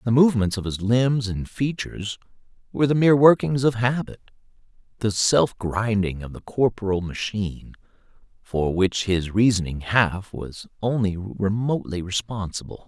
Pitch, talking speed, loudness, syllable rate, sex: 105 Hz, 125 wpm, -22 LUFS, 4.8 syllables/s, male